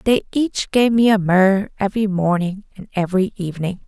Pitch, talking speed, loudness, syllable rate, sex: 200 Hz, 170 wpm, -18 LUFS, 5.2 syllables/s, female